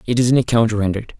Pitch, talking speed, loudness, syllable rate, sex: 115 Hz, 250 wpm, -17 LUFS, 7.6 syllables/s, male